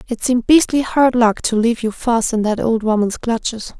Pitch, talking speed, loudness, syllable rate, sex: 230 Hz, 220 wpm, -16 LUFS, 5.3 syllables/s, female